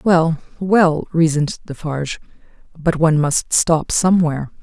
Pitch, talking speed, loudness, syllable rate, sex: 160 Hz, 115 wpm, -17 LUFS, 4.7 syllables/s, female